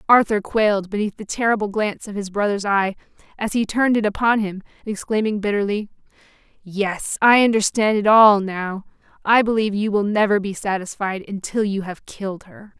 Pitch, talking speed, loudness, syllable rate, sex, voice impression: 205 Hz, 170 wpm, -20 LUFS, 5.4 syllables/s, female, feminine, slightly young, tensed, clear, cute, slightly refreshing, friendly, slightly kind